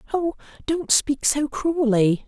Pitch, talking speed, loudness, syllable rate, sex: 280 Hz, 130 wpm, -22 LUFS, 3.6 syllables/s, female